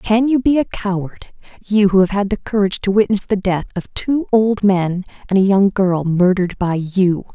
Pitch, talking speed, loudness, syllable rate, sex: 200 Hz, 205 wpm, -16 LUFS, 4.9 syllables/s, female